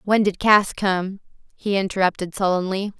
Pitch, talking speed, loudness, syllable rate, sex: 195 Hz, 140 wpm, -21 LUFS, 4.8 syllables/s, female